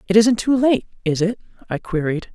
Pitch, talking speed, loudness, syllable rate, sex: 205 Hz, 205 wpm, -19 LUFS, 5.3 syllables/s, female